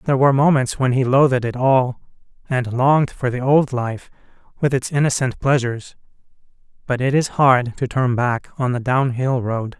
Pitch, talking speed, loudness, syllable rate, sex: 130 Hz, 180 wpm, -18 LUFS, 5.1 syllables/s, male